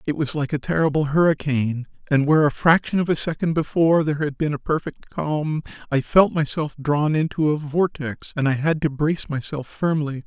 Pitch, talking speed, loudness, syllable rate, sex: 150 Hz, 200 wpm, -21 LUFS, 5.4 syllables/s, male